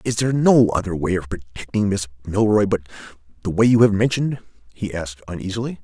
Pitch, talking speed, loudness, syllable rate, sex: 100 Hz, 185 wpm, -20 LUFS, 6.4 syllables/s, male